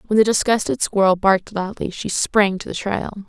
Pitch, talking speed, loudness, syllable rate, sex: 200 Hz, 200 wpm, -19 LUFS, 5.4 syllables/s, female